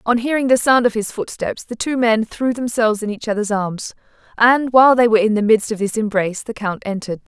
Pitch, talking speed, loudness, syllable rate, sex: 225 Hz, 235 wpm, -17 LUFS, 6.0 syllables/s, female